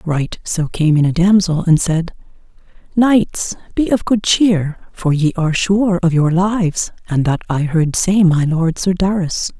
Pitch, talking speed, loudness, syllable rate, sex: 175 Hz, 180 wpm, -15 LUFS, 4.2 syllables/s, female